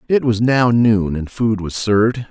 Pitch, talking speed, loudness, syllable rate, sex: 110 Hz, 210 wpm, -16 LUFS, 4.3 syllables/s, male